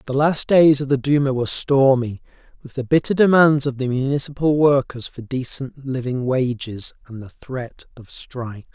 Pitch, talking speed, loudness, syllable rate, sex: 135 Hz, 170 wpm, -19 LUFS, 4.8 syllables/s, male